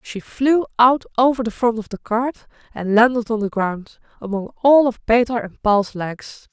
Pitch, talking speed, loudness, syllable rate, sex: 230 Hz, 195 wpm, -18 LUFS, 4.4 syllables/s, female